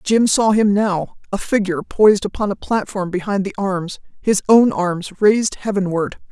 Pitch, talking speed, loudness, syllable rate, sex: 195 Hz, 170 wpm, -18 LUFS, 4.7 syllables/s, female